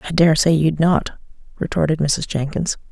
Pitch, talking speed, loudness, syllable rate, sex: 155 Hz, 165 wpm, -18 LUFS, 5.0 syllables/s, female